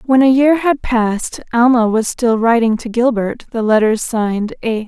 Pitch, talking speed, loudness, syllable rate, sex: 235 Hz, 185 wpm, -15 LUFS, 4.7 syllables/s, female